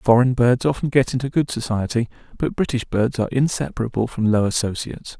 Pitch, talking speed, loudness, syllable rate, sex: 120 Hz, 175 wpm, -21 LUFS, 6.0 syllables/s, male